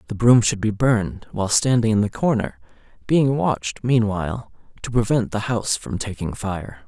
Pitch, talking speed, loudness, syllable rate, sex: 110 Hz, 175 wpm, -21 LUFS, 5.2 syllables/s, male